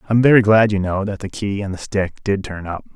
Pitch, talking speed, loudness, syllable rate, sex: 100 Hz, 285 wpm, -18 LUFS, 5.6 syllables/s, male